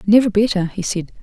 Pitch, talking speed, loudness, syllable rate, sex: 200 Hz, 195 wpm, -17 LUFS, 5.9 syllables/s, female